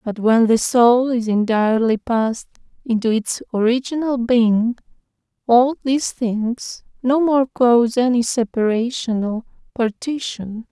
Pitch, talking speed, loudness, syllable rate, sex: 235 Hz, 120 wpm, -18 LUFS, 4.2 syllables/s, female